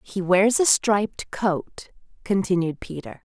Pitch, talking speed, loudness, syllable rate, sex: 195 Hz, 125 wpm, -22 LUFS, 3.9 syllables/s, female